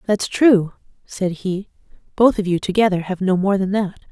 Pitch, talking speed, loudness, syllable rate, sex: 195 Hz, 190 wpm, -18 LUFS, 4.9 syllables/s, female